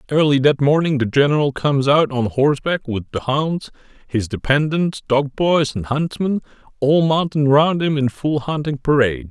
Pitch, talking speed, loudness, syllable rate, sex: 145 Hz, 170 wpm, -18 LUFS, 5.0 syllables/s, male